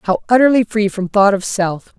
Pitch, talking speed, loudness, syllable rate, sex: 205 Hz, 210 wpm, -15 LUFS, 4.8 syllables/s, female